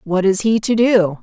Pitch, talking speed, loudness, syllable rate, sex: 205 Hz, 245 wpm, -15 LUFS, 4.5 syllables/s, female